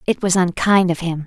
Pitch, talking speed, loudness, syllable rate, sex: 180 Hz, 240 wpm, -17 LUFS, 5.3 syllables/s, female